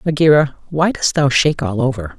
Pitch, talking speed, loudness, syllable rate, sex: 140 Hz, 190 wpm, -15 LUFS, 5.6 syllables/s, male